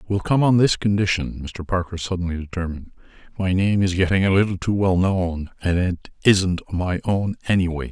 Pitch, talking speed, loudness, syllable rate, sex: 90 Hz, 180 wpm, -21 LUFS, 5.5 syllables/s, male